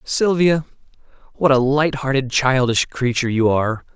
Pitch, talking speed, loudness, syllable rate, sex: 135 Hz, 120 wpm, -18 LUFS, 4.9 syllables/s, male